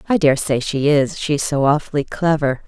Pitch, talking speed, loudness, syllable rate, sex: 150 Hz, 180 wpm, -18 LUFS, 4.8 syllables/s, female